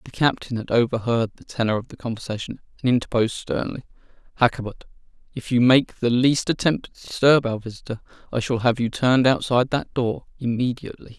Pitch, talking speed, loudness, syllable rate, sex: 120 Hz, 170 wpm, -22 LUFS, 6.2 syllables/s, male